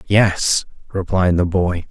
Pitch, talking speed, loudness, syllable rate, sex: 90 Hz, 125 wpm, -18 LUFS, 3.3 syllables/s, male